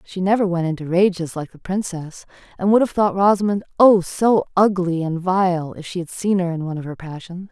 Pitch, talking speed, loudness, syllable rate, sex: 180 Hz, 215 wpm, -19 LUFS, 5.4 syllables/s, female